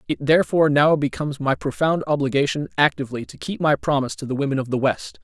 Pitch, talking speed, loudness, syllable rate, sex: 145 Hz, 205 wpm, -21 LUFS, 6.7 syllables/s, male